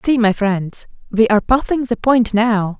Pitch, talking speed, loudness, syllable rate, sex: 225 Hz, 195 wpm, -16 LUFS, 4.5 syllables/s, female